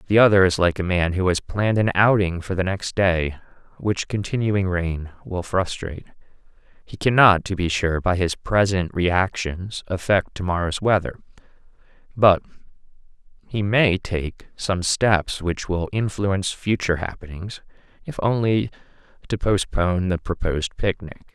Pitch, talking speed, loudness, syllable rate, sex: 95 Hz, 145 wpm, -21 LUFS, 4.6 syllables/s, male